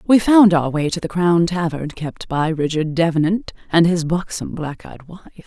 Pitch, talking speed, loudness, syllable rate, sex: 170 Hz, 200 wpm, -18 LUFS, 4.5 syllables/s, female